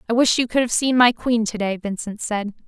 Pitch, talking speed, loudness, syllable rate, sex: 225 Hz, 245 wpm, -20 LUFS, 5.5 syllables/s, female